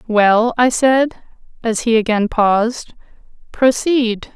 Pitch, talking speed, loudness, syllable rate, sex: 235 Hz, 95 wpm, -15 LUFS, 3.6 syllables/s, female